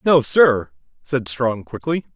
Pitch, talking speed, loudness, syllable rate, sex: 125 Hz, 140 wpm, -19 LUFS, 3.6 syllables/s, male